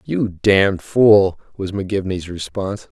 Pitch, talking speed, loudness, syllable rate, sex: 95 Hz, 120 wpm, -18 LUFS, 4.6 syllables/s, male